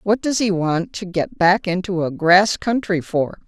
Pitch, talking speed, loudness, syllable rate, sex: 185 Hz, 205 wpm, -19 LUFS, 4.2 syllables/s, female